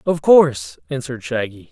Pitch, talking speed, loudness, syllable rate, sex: 130 Hz, 140 wpm, -17 LUFS, 5.4 syllables/s, male